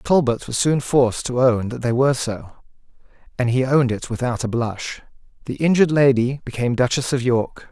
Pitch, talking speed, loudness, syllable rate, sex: 125 Hz, 185 wpm, -20 LUFS, 5.5 syllables/s, male